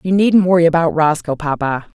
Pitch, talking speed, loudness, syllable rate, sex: 165 Hz, 180 wpm, -15 LUFS, 5.4 syllables/s, female